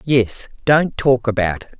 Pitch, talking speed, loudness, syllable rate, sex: 120 Hz, 165 wpm, -18 LUFS, 3.9 syllables/s, female